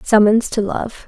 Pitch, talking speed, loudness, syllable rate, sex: 215 Hz, 170 wpm, -16 LUFS, 4.1 syllables/s, female